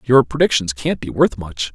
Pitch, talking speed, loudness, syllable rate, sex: 120 Hz, 205 wpm, -18 LUFS, 4.9 syllables/s, male